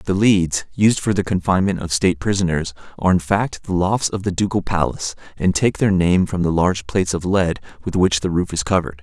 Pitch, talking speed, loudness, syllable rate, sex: 90 Hz, 225 wpm, -19 LUFS, 5.8 syllables/s, male